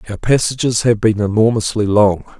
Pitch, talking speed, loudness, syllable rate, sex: 110 Hz, 150 wpm, -15 LUFS, 5.3 syllables/s, male